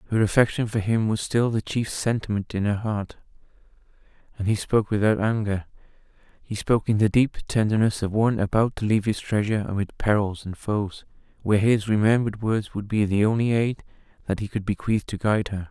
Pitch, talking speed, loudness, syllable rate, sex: 105 Hz, 190 wpm, -24 LUFS, 5.8 syllables/s, male